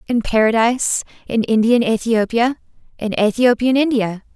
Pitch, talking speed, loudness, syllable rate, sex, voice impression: 230 Hz, 85 wpm, -17 LUFS, 4.9 syllables/s, female, feminine, slightly young, tensed, bright, clear, fluent, cute, friendly, slightly reassuring, elegant, lively, kind